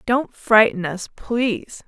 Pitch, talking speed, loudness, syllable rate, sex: 220 Hz, 130 wpm, -19 LUFS, 3.6 syllables/s, female